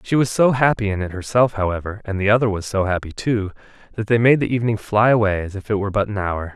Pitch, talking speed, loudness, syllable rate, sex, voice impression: 105 Hz, 265 wpm, -19 LUFS, 6.5 syllables/s, male, masculine, adult-like, slightly thick, cool, sincere, calm, slightly sweet